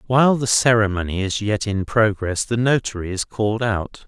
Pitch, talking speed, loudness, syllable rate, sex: 110 Hz, 175 wpm, -20 LUFS, 5.1 syllables/s, male